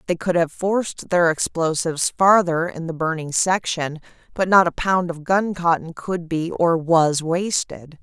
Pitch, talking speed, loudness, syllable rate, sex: 170 Hz, 165 wpm, -20 LUFS, 4.3 syllables/s, female